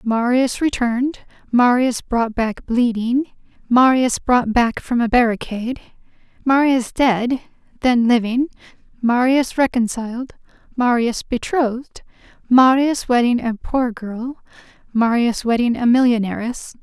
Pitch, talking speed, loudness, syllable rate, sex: 245 Hz, 105 wpm, -18 LUFS, 4.1 syllables/s, female